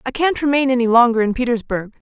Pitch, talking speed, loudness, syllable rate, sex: 245 Hz, 200 wpm, -17 LUFS, 6.3 syllables/s, female